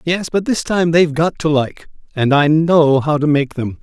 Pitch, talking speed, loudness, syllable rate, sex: 155 Hz, 235 wpm, -15 LUFS, 4.7 syllables/s, male